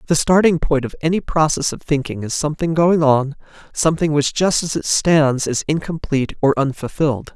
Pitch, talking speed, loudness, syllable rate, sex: 150 Hz, 180 wpm, -18 LUFS, 5.4 syllables/s, male